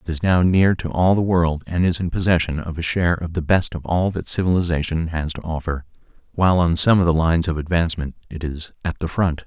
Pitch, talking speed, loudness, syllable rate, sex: 85 Hz, 240 wpm, -20 LUFS, 5.9 syllables/s, male